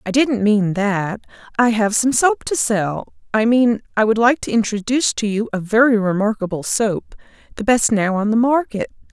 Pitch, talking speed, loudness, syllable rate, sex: 220 Hz, 190 wpm, -18 LUFS, 4.8 syllables/s, female